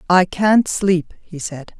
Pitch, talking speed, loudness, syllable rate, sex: 180 Hz, 170 wpm, -17 LUFS, 3.3 syllables/s, female